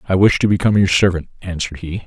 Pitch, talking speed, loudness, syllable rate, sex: 95 Hz, 230 wpm, -16 LUFS, 7.5 syllables/s, male